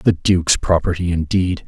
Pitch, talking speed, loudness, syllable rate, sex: 85 Hz, 145 wpm, -17 LUFS, 4.9 syllables/s, male